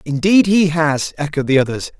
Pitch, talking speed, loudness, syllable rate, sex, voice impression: 155 Hz, 180 wpm, -15 LUFS, 5.0 syllables/s, male, masculine, tensed, powerful, very fluent, slightly refreshing, slightly unique, lively, slightly intense